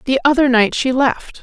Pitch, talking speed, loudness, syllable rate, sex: 260 Hz, 210 wpm, -15 LUFS, 4.8 syllables/s, female